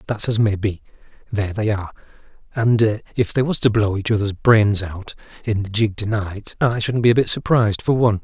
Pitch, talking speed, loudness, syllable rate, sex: 105 Hz, 220 wpm, -19 LUFS, 5.8 syllables/s, male